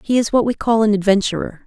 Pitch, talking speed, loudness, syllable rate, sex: 215 Hz, 250 wpm, -17 LUFS, 6.4 syllables/s, female